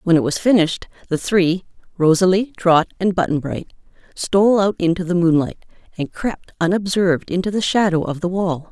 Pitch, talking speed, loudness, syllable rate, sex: 180 Hz, 160 wpm, -18 LUFS, 5.3 syllables/s, female